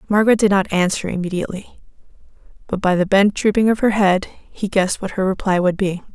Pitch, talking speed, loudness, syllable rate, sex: 195 Hz, 195 wpm, -18 LUFS, 6.0 syllables/s, female